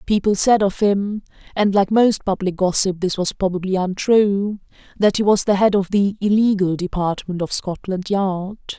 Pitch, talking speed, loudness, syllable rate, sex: 195 Hz, 155 wpm, -18 LUFS, 4.7 syllables/s, female